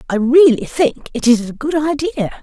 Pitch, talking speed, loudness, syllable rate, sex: 275 Hz, 200 wpm, -15 LUFS, 5.2 syllables/s, female